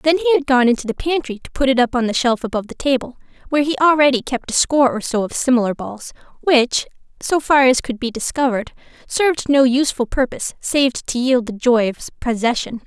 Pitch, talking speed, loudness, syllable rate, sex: 260 Hz, 215 wpm, -17 LUFS, 6.2 syllables/s, female